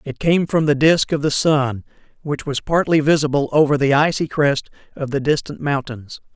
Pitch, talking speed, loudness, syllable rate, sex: 145 Hz, 190 wpm, -18 LUFS, 4.9 syllables/s, male